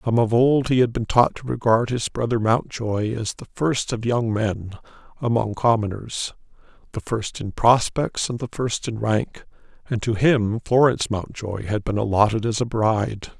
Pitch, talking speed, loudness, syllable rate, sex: 115 Hz, 175 wpm, -22 LUFS, 4.5 syllables/s, male